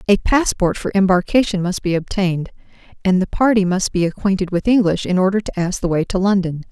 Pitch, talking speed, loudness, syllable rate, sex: 190 Hz, 205 wpm, -18 LUFS, 5.8 syllables/s, female